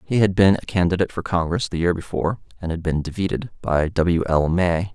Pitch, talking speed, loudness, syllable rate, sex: 90 Hz, 220 wpm, -21 LUFS, 5.8 syllables/s, male